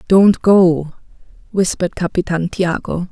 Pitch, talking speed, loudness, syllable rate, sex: 180 Hz, 95 wpm, -16 LUFS, 3.8 syllables/s, female